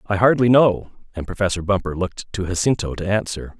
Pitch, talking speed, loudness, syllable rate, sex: 100 Hz, 185 wpm, -20 LUFS, 5.9 syllables/s, male